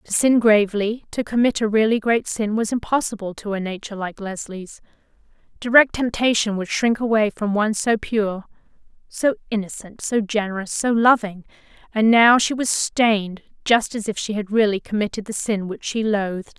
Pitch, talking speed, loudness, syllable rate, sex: 215 Hz, 175 wpm, -20 LUFS, 5.2 syllables/s, female